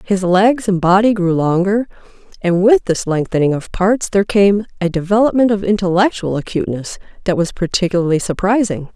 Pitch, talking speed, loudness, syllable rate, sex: 190 Hz, 155 wpm, -15 LUFS, 5.5 syllables/s, female